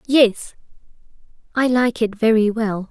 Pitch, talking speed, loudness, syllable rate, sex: 225 Hz, 105 wpm, -18 LUFS, 4.0 syllables/s, female